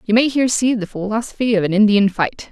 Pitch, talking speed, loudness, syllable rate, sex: 215 Hz, 240 wpm, -17 LUFS, 6.2 syllables/s, female